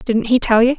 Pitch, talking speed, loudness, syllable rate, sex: 235 Hz, 305 wpm, -15 LUFS, 5.4 syllables/s, female